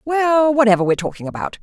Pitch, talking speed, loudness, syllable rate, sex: 240 Hz, 185 wpm, -17 LUFS, 6.5 syllables/s, female